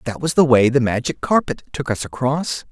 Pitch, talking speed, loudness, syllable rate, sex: 130 Hz, 220 wpm, -18 LUFS, 5.3 syllables/s, male